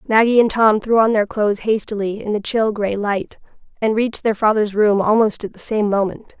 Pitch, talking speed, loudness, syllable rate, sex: 210 Hz, 215 wpm, -18 LUFS, 5.3 syllables/s, female